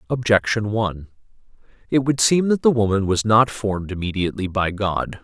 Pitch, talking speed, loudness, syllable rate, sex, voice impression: 105 Hz, 160 wpm, -20 LUFS, 5.5 syllables/s, male, masculine, adult-like, tensed, powerful, fluent, intellectual, calm, mature, slightly reassuring, wild, lively, slightly strict